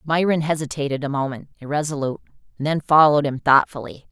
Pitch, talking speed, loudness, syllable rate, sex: 145 Hz, 145 wpm, -20 LUFS, 6.5 syllables/s, female